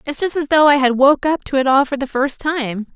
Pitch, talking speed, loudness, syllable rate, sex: 275 Hz, 305 wpm, -16 LUFS, 5.4 syllables/s, female